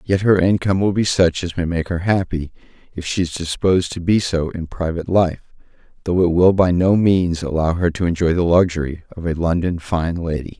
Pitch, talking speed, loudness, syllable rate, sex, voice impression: 90 Hz, 215 wpm, -18 LUFS, 5.5 syllables/s, male, masculine, middle-aged, thick, dark, slightly hard, sincere, calm, mature, slightly reassuring, wild, slightly kind, strict